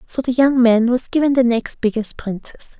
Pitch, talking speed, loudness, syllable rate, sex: 245 Hz, 215 wpm, -17 LUFS, 5.3 syllables/s, female